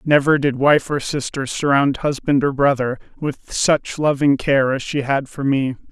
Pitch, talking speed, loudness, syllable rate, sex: 140 Hz, 185 wpm, -18 LUFS, 4.4 syllables/s, male